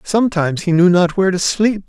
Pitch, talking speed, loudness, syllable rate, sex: 185 Hz, 225 wpm, -15 LUFS, 6.2 syllables/s, male